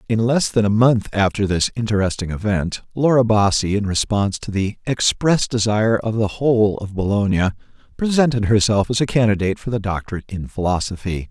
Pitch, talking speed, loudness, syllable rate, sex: 105 Hz, 170 wpm, -19 LUFS, 5.8 syllables/s, male